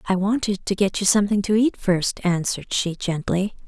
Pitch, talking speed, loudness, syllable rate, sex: 195 Hz, 195 wpm, -21 LUFS, 5.3 syllables/s, female